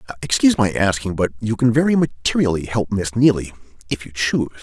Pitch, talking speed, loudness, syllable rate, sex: 105 Hz, 180 wpm, -19 LUFS, 6.3 syllables/s, male